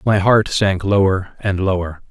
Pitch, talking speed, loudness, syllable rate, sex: 95 Hz, 170 wpm, -17 LUFS, 4.3 syllables/s, male